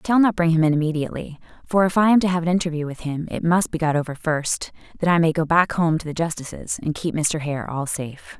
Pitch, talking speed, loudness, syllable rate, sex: 160 Hz, 270 wpm, -21 LUFS, 6.3 syllables/s, female